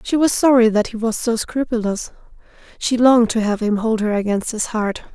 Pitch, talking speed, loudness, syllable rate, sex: 225 Hz, 210 wpm, -18 LUFS, 5.3 syllables/s, female